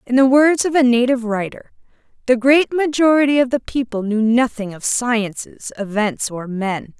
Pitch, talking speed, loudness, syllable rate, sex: 240 Hz, 170 wpm, -17 LUFS, 4.8 syllables/s, female